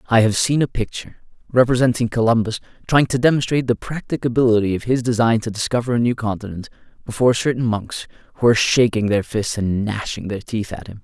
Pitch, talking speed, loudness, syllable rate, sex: 115 Hz, 185 wpm, -19 LUFS, 6.3 syllables/s, male